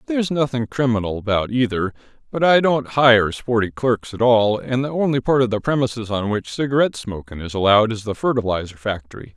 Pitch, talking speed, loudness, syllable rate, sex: 120 Hz, 190 wpm, -19 LUFS, 5.8 syllables/s, male